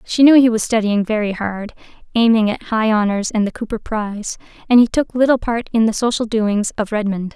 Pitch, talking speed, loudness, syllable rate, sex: 220 Hz, 210 wpm, -17 LUFS, 5.4 syllables/s, female